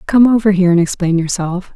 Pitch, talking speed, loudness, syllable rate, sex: 190 Hz, 205 wpm, -14 LUFS, 6.2 syllables/s, female